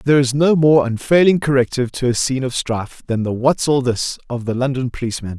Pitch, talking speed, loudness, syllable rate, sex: 130 Hz, 225 wpm, -17 LUFS, 6.2 syllables/s, male